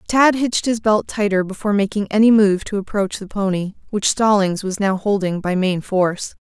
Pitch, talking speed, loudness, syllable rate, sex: 200 Hz, 195 wpm, -18 LUFS, 5.3 syllables/s, female